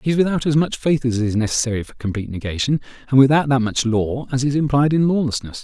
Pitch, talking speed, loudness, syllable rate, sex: 130 Hz, 225 wpm, -19 LUFS, 6.4 syllables/s, male